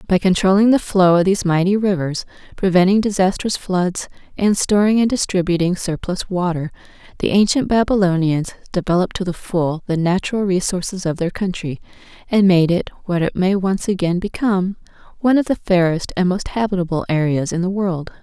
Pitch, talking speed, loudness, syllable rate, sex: 185 Hz, 160 wpm, -18 LUFS, 5.5 syllables/s, female